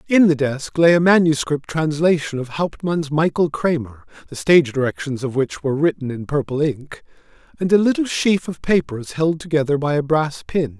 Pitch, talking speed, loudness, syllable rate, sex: 155 Hz, 185 wpm, -19 LUFS, 5.1 syllables/s, male